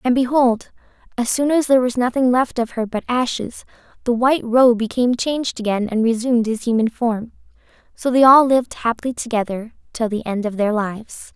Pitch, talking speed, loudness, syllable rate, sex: 240 Hz, 190 wpm, -18 LUFS, 5.7 syllables/s, female